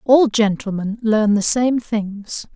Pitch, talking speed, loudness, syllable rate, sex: 220 Hz, 140 wpm, -18 LUFS, 3.4 syllables/s, female